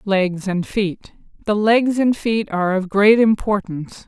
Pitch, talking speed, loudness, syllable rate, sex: 205 Hz, 145 wpm, -18 LUFS, 4.1 syllables/s, female